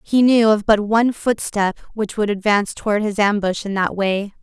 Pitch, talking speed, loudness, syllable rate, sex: 210 Hz, 205 wpm, -18 LUFS, 5.1 syllables/s, female